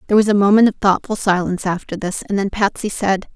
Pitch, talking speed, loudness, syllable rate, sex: 200 Hz, 230 wpm, -17 LUFS, 6.4 syllables/s, female